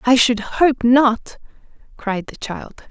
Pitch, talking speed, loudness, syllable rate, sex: 240 Hz, 145 wpm, -17 LUFS, 3.2 syllables/s, female